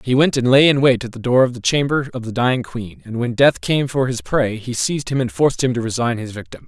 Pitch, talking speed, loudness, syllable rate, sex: 125 Hz, 295 wpm, -18 LUFS, 6.0 syllables/s, male